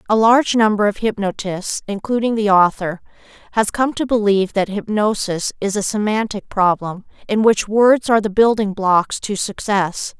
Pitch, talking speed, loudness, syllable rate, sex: 205 Hz, 160 wpm, -17 LUFS, 4.8 syllables/s, female